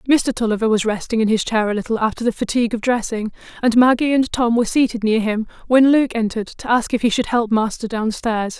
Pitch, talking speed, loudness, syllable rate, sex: 230 Hz, 230 wpm, -18 LUFS, 6.1 syllables/s, female